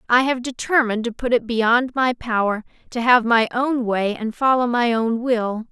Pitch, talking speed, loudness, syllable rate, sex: 235 Hz, 200 wpm, -19 LUFS, 4.6 syllables/s, female